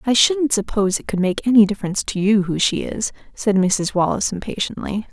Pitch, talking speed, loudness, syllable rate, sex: 210 Hz, 200 wpm, -19 LUFS, 5.9 syllables/s, female